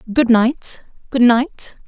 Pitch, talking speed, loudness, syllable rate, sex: 240 Hz, 130 wpm, -16 LUFS, 3.2 syllables/s, female